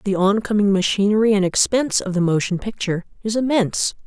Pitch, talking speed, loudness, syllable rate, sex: 205 Hz, 160 wpm, -19 LUFS, 6.2 syllables/s, female